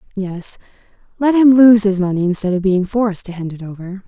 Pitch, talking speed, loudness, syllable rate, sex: 200 Hz, 205 wpm, -15 LUFS, 5.7 syllables/s, female